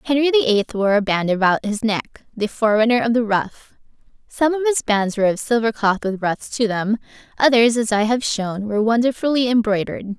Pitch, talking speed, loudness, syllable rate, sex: 225 Hz, 200 wpm, -19 LUFS, 5.6 syllables/s, female